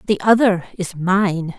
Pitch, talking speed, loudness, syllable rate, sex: 190 Hz, 150 wpm, -17 LUFS, 3.8 syllables/s, female